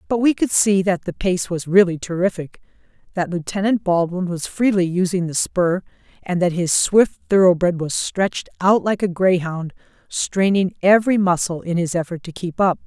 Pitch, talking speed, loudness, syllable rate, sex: 180 Hz, 175 wpm, -19 LUFS, 4.9 syllables/s, female